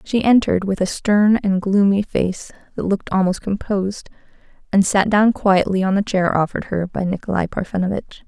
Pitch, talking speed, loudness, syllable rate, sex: 195 Hz, 175 wpm, -18 LUFS, 5.5 syllables/s, female